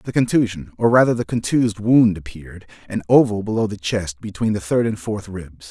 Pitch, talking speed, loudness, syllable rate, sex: 105 Hz, 190 wpm, -19 LUFS, 5.5 syllables/s, male